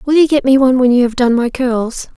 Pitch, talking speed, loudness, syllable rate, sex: 255 Hz, 300 wpm, -13 LUFS, 5.8 syllables/s, female